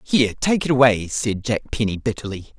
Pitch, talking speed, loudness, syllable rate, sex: 115 Hz, 185 wpm, -20 LUFS, 5.7 syllables/s, male